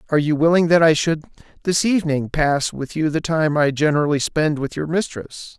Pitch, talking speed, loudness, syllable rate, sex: 155 Hz, 205 wpm, -19 LUFS, 5.4 syllables/s, male